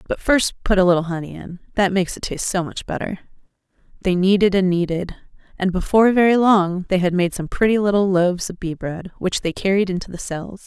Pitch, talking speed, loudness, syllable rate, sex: 185 Hz, 210 wpm, -19 LUFS, 5.9 syllables/s, female